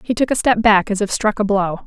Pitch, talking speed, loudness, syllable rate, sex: 210 Hz, 320 wpm, -16 LUFS, 5.8 syllables/s, female